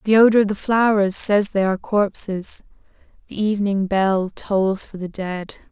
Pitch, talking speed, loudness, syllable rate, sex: 200 Hz, 170 wpm, -19 LUFS, 4.6 syllables/s, female